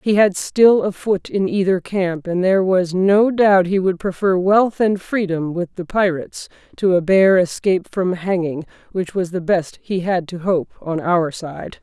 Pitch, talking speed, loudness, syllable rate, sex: 185 Hz, 200 wpm, -18 LUFS, 4.3 syllables/s, female